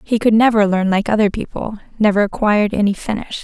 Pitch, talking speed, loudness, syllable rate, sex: 210 Hz, 190 wpm, -16 LUFS, 6.1 syllables/s, female